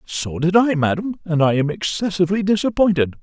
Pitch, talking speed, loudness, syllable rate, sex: 175 Hz, 165 wpm, -19 LUFS, 5.7 syllables/s, male